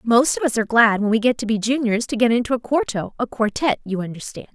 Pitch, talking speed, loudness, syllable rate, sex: 230 Hz, 250 wpm, -20 LUFS, 6.5 syllables/s, female